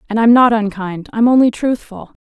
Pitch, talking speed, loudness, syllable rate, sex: 225 Hz, 190 wpm, -14 LUFS, 5.1 syllables/s, female